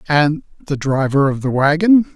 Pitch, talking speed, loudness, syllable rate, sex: 150 Hz, 165 wpm, -16 LUFS, 4.8 syllables/s, male